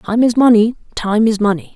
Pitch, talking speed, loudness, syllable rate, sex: 220 Hz, 205 wpm, -14 LUFS, 5.6 syllables/s, female